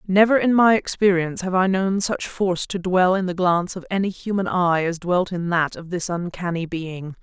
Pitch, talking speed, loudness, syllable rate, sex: 180 Hz, 215 wpm, -21 LUFS, 5.1 syllables/s, female